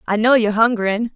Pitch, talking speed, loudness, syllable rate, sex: 220 Hz, 210 wpm, -16 LUFS, 6.9 syllables/s, female